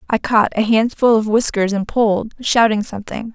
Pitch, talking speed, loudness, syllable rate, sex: 220 Hz, 180 wpm, -16 LUFS, 5.2 syllables/s, female